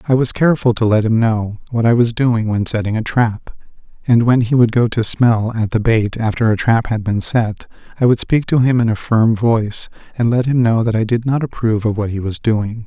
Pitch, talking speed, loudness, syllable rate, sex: 115 Hz, 250 wpm, -16 LUFS, 5.3 syllables/s, male